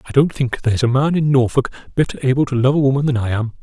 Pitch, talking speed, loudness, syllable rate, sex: 130 Hz, 280 wpm, -17 LUFS, 7.3 syllables/s, male